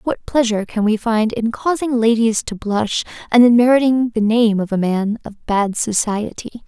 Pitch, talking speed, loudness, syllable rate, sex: 225 Hz, 190 wpm, -17 LUFS, 4.8 syllables/s, female